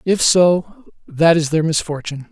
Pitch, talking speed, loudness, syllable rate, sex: 165 Hz, 155 wpm, -16 LUFS, 4.5 syllables/s, male